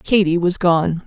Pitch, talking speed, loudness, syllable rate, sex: 180 Hz, 170 wpm, -17 LUFS, 3.9 syllables/s, female